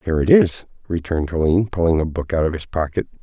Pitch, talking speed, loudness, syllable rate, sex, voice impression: 85 Hz, 225 wpm, -19 LUFS, 6.9 syllables/s, male, masculine, middle-aged, thick, slightly relaxed, slightly powerful, bright, muffled, raspy, cool, calm, mature, friendly, reassuring, wild, lively, slightly kind